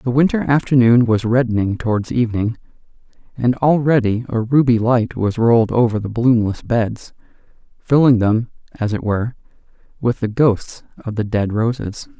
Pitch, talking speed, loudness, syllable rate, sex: 115 Hz, 150 wpm, -17 LUFS, 4.9 syllables/s, male